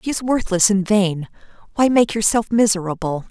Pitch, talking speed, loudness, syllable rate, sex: 205 Hz, 165 wpm, -18 LUFS, 5.2 syllables/s, female